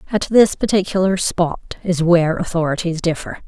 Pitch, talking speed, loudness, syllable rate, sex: 175 Hz, 140 wpm, -17 LUFS, 5.2 syllables/s, female